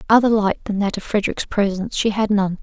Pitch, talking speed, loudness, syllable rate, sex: 205 Hz, 230 wpm, -19 LUFS, 6.1 syllables/s, female